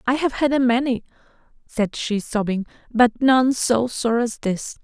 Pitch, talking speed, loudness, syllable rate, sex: 240 Hz, 175 wpm, -20 LUFS, 4.4 syllables/s, female